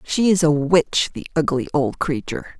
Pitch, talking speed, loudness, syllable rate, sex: 155 Hz, 185 wpm, -20 LUFS, 5.1 syllables/s, female